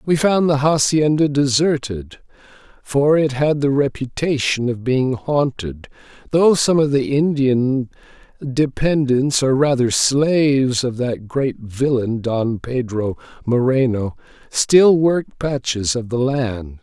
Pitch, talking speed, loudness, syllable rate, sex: 130 Hz, 125 wpm, -18 LUFS, 3.7 syllables/s, male